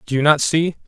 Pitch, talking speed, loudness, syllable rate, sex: 150 Hz, 275 wpm, -17 LUFS, 6.0 syllables/s, male